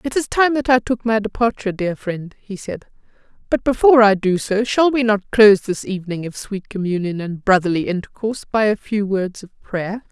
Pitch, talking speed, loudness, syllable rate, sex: 210 Hz, 210 wpm, -18 LUFS, 5.4 syllables/s, female